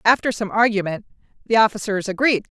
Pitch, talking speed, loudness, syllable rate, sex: 210 Hz, 140 wpm, -19 LUFS, 6.1 syllables/s, female